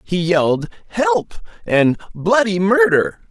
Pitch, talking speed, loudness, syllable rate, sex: 175 Hz, 110 wpm, -16 LUFS, 3.6 syllables/s, male